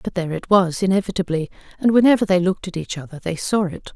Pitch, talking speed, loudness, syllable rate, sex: 185 Hz, 230 wpm, -20 LUFS, 6.9 syllables/s, female